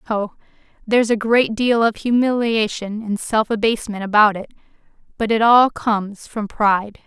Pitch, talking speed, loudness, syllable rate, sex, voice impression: 220 Hz, 155 wpm, -18 LUFS, 4.9 syllables/s, female, very feminine, slightly young, adult-like, thin, tensed, slightly powerful, bright, hard, very clear, fluent, cute, slightly cool, intellectual, refreshing, slightly sincere, slightly calm, slightly friendly, reassuring, unique, elegant, slightly sweet, slightly lively, very kind